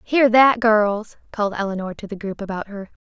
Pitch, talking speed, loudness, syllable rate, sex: 210 Hz, 200 wpm, -19 LUFS, 5.3 syllables/s, female